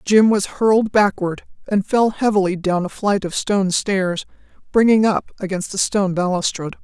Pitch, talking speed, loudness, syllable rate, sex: 200 Hz, 165 wpm, -18 LUFS, 5.1 syllables/s, female